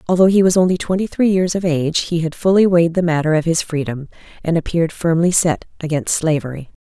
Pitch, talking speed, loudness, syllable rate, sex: 170 Hz, 210 wpm, -17 LUFS, 6.2 syllables/s, female